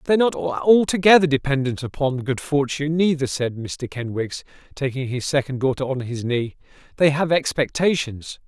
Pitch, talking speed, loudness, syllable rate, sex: 140 Hz, 150 wpm, -21 LUFS, 5.0 syllables/s, male